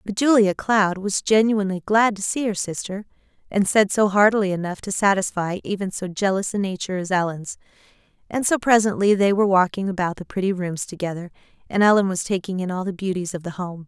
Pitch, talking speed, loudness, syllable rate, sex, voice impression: 195 Hz, 200 wpm, -21 LUFS, 5.9 syllables/s, female, feminine, slightly adult-like, slightly clear, slightly intellectual, calm, friendly, slightly sweet